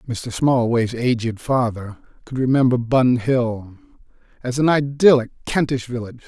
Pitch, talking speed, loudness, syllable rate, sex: 125 Hz, 125 wpm, -19 LUFS, 4.7 syllables/s, male